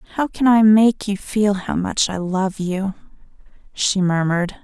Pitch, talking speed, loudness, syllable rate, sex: 200 Hz, 170 wpm, -18 LUFS, 4.3 syllables/s, female